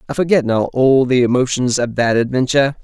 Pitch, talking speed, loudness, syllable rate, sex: 130 Hz, 190 wpm, -15 LUFS, 5.8 syllables/s, male